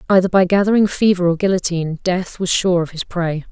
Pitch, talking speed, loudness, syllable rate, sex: 180 Hz, 205 wpm, -17 LUFS, 5.8 syllables/s, female